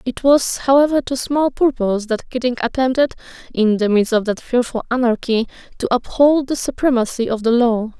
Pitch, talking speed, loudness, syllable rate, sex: 245 Hz, 175 wpm, -17 LUFS, 5.3 syllables/s, female